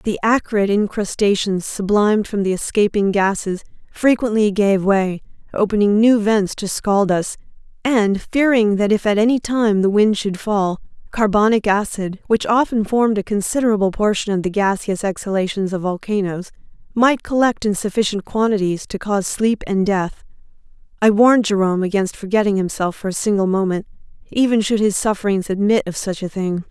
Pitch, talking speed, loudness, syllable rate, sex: 205 Hz, 160 wpm, -18 LUFS, 5.2 syllables/s, female